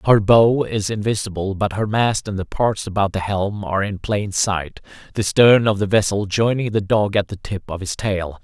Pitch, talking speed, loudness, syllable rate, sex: 100 Hz, 220 wpm, -19 LUFS, 4.8 syllables/s, male